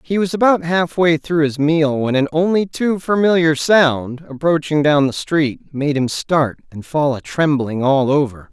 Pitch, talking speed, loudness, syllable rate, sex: 150 Hz, 185 wpm, -16 LUFS, 4.4 syllables/s, male